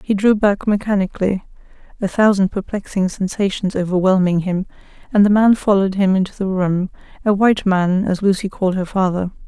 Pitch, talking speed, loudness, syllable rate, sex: 195 Hz, 160 wpm, -17 LUFS, 5.7 syllables/s, female